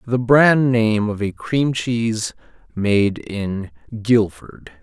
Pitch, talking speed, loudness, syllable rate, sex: 110 Hz, 125 wpm, -18 LUFS, 3.0 syllables/s, male